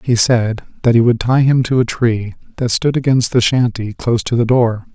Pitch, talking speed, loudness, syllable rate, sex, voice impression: 120 Hz, 230 wpm, -15 LUFS, 5.1 syllables/s, male, masculine, very adult-like, slightly thick, cool, sincere, calm, slightly sweet, slightly kind